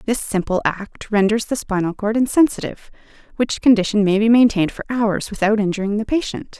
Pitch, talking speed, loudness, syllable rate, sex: 215 Hz, 175 wpm, -18 LUFS, 5.7 syllables/s, female